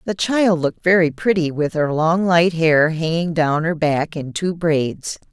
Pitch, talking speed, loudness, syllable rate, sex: 165 Hz, 190 wpm, -18 LUFS, 4.1 syllables/s, female